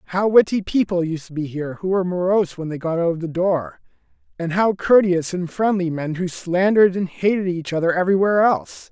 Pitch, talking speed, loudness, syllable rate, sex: 180 Hz, 210 wpm, -20 LUFS, 5.9 syllables/s, male